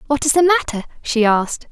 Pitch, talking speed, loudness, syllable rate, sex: 270 Hz, 210 wpm, -16 LUFS, 7.0 syllables/s, female